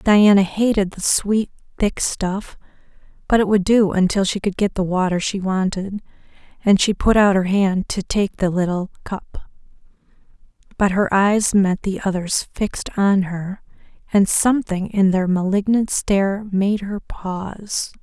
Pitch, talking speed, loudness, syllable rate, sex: 195 Hz, 155 wpm, -19 LUFS, 4.3 syllables/s, female